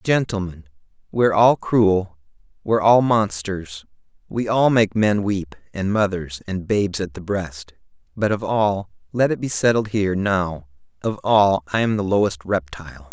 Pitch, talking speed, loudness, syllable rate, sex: 100 Hz, 160 wpm, -20 LUFS, 4.5 syllables/s, male